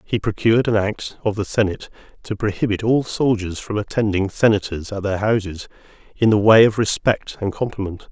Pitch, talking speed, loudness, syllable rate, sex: 105 Hz, 175 wpm, -19 LUFS, 5.5 syllables/s, male